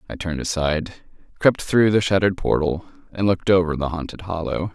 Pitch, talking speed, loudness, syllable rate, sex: 90 Hz, 175 wpm, -21 LUFS, 6.1 syllables/s, male